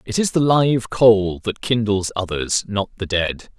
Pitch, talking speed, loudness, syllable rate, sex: 110 Hz, 185 wpm, -19 LUFS, 4.0 syllables/s, male